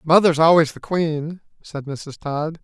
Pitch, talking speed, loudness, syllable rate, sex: 160 Hz, 160 wpm, -19 LUFS, 4.0 syllables/s, male